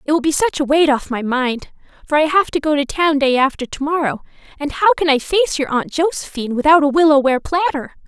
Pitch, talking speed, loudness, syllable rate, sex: 295 Hz, 240 wpm, -16 LUFS, 5.7 syllables/s, female